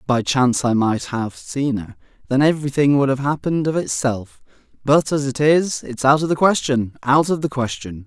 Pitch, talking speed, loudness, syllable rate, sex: 135 Hz, 200 wpm, -19 LUFS, 5.1 syllables/s, male